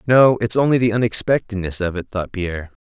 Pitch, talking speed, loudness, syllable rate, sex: 105 Hz, 190 wpm, -18 LUFS, 5.8 syllables/s, male